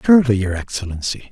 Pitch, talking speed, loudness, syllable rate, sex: 115 Hz, 135 wpm, -19 LUFS, 7.0 syllables/s, male